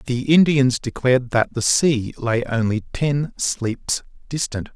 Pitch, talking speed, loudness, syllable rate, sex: 125 Hz, 140 wpm, -20 LUFS, 3.7 syllables/s, male